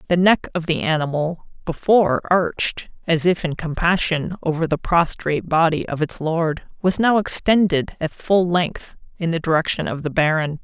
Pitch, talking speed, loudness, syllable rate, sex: 165 Hz, 170 wpm, -20 LUFS, 4.8 syllables/s, female